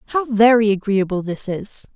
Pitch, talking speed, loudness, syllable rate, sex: 215 Hz, 155 wpm, -18 LUFS, 4.9 syllables/s, female